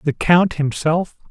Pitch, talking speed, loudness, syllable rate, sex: 160 Hz, 140 wpm, -17 LUFS, 3.8 syllables/s, male